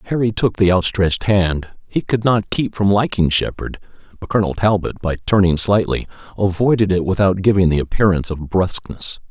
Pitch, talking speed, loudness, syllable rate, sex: 95 Hz, 155 wpm, -17 LUFS, 5.6 syllables/s, male